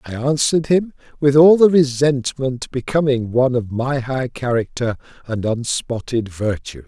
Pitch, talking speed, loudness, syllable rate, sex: 130 Hz, 140 wpm, -18 LUFS, 4.4 syllables/s, male